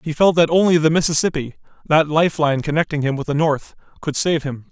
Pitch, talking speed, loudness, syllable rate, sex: 155 Hz, 215 wpm, -18 LUFS, 5.8 syllables/s, male